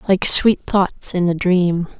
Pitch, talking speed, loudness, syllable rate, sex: 185 Hz, 180 wpm, -16 LUFS, 3.5 syllables/s, female